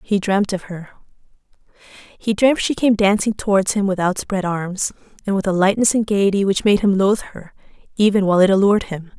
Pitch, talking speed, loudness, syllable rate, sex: 195 Hz, 195 wpm, -18 LUFS, 5.6 syllables/s, female